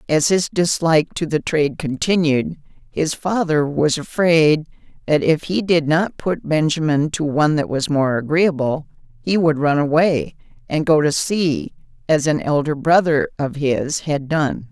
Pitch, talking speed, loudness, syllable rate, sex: 155 Hz, 165 wpm, -18 LUFS, 4.3 syllables/s, female